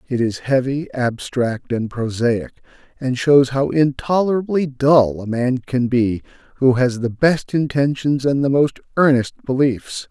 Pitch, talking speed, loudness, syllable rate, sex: 130 Hz, 150 wpm, -18 LUFS, 4.1 syllables/s, male